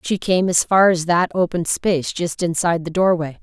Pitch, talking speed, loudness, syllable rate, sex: 175 Hz, 210 wpm, -18 LUFS, 5.2 syllables/s, female